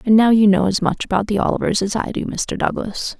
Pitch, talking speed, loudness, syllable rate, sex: 210 Hz, 265 wpm, -18 LUFS, 5.8 syllables/s, female